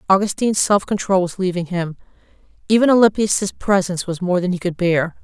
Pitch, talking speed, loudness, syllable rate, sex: 190 Hz, 170 wpm, -18 LUFS, 5.8 syllables/s, female